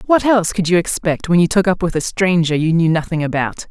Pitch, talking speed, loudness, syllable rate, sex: 175 Hz, 260 wpm, -16 LUFS, 5.9 syllables/s, female